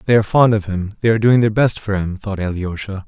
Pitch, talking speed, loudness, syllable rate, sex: 100 Hz, 275 wpm, -17 LUFS, 6.5 syllables/s, male